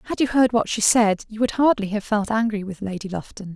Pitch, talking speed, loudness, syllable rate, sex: 215 Hz, 255 wpm, -21 LUFS, 5.8 syllables/s, female